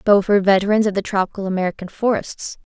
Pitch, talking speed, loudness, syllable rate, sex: 200 Hz, 175 wpm, -19 LUFS, 6.8 syllables/s, female